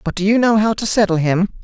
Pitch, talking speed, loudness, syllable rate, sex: 200 Hz, 295 wpm, -16 LUFS, 6.2 syllables/s, male